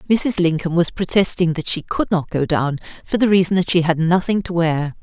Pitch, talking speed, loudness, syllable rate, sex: 175 Hz, 225 wpm, -18 LUFS, 5.3 syllables/s, female